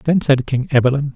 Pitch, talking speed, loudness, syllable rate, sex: 140 Hz, 210 wpm, -16 LUFS, 5.4 syllables/s, male